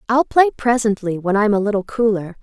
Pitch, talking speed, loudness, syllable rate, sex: 215 Hz, 200 wpm, -17 LUFS, 5.4 syllables/s, female